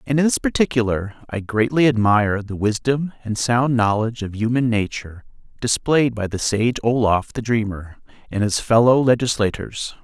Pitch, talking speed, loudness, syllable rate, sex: 115 Hz, 155 wpm, -19 LUFS, 5.2 syllables/s, male